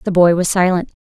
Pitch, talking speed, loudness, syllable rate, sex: 180 Hz, 235 wpm, -14 LUFS, 6.3 syllables/s, female